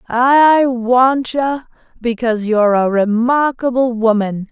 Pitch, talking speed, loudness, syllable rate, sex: 240 Hz, 105 wpm, -14 LUFS, 3.8 syllables/s, female